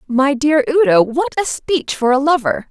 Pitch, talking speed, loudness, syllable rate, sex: 280 Hz, 200 wpm, -15 LUFS, 4.7 syllables/s, female